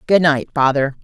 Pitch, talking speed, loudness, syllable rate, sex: 150 Hz, 175 wpm, -16 LUFS, 5.0 syllables/s, female